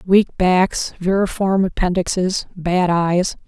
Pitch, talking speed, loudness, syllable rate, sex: 185 Hz, 105 wpm, -18 LUFS, 3.5 syllables/s, female